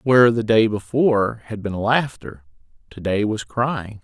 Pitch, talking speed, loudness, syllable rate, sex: 110 Hz, 165 wpm, -20 LUFS, 4.4 syllables/s, male